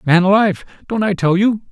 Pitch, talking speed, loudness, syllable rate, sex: 195 Hz, 210 wpm, -15 LUFS, 5.9 syllables/s, male